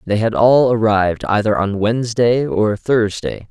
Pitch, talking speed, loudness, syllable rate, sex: 110 Hz, 155 wpm, -16 LUFS, 4.5 syllables/s, male